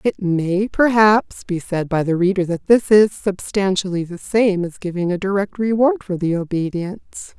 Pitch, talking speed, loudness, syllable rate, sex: 190 Hz, 180 wpm, -18 LUFS, 4.6 syllables/s, female